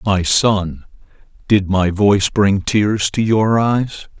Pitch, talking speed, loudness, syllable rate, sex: 100 Hz, 145 wpm, -15 LUFS, 3.2 syllables/s, male